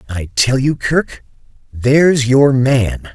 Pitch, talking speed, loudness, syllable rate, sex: 130 Hz, 135 wpm, -14 LUFS, 3.3 syllables/s, male